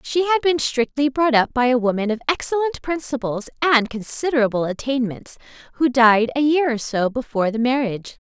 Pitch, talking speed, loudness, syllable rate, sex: 255 Hz, 175 wpm, -20 LUFS, 5.5 syllables/s, female